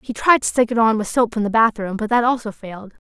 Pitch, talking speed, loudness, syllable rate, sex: 225 Hz, 295 wpm, -18 LUFS, 6.3 syllables/s, female